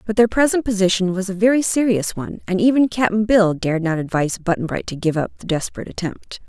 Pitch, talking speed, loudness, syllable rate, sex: 200 Hz, 220 wpm, -19 LUFS, 6.3 syllables/s, female